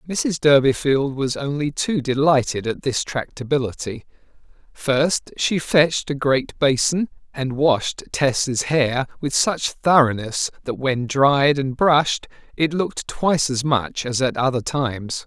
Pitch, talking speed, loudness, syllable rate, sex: 140 Hz, 140 wpm, -20 LUFS, 4.0 syllables/s, male